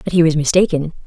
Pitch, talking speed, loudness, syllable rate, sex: 160 Hz, 225 wpm, -15 LUFS, 7.0 syllables/s, female